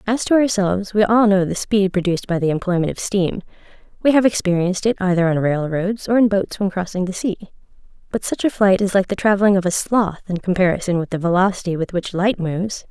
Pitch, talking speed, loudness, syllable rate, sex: 190 Hz, 225 wpm, -18 LUFS, 6.0 syllables/s, female